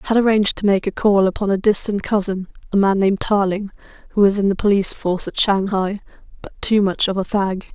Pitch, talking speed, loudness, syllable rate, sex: 200 Hz, 200 wpm, -18 LUFS, 6.2 syllables/s, female